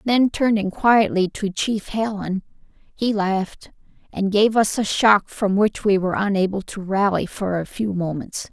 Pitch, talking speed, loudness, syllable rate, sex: 200 Hz, 170 wpm, -20 LUFS, 4.3 syllables/s, female